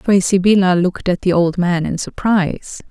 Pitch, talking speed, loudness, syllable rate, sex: 185 Hz, 185 wpm, -16 LUFS, 5.0 syllables/s, female